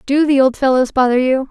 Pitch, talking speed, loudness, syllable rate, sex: 265 Hz, 240 wpm, -14 LUFS, 5.8 syllables/s, female